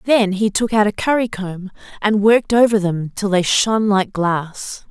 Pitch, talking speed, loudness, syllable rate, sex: 200 Hz, 185 wpm, -17 LUFS, 4.6 syllables/s, female